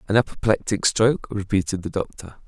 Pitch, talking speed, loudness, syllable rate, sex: 105 Hz, 145 wpm, -22 LUFS, 6.0 syllables/s, male